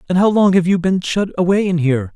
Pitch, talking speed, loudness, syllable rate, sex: 180 Hz, 280 wpm, -15 LUFS, 6.2 syllables/s, male